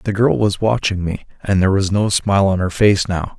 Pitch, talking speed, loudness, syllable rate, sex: 100 Hz, 250 wpm, -17 LUFS, 5.6 syllables/s, male